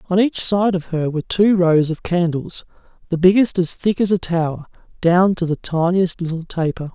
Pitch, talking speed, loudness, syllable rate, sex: 175 Hz, 200 wpm, -18 LUFS, 5.0 syllables/s, male